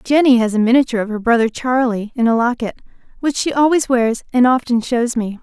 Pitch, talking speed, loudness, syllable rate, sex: 240 Hz, 210 wpm, -16 LUFS, 5.9 syllables/s, female